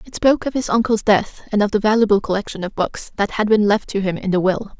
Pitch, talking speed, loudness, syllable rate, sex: 210 Hz, 275 wpm, -18 LUFS, 6.2 syllables/s, female